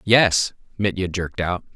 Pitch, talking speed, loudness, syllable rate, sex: 95 Hz, 135 wpm, -21 LUFS, 4.5 syllables/s, male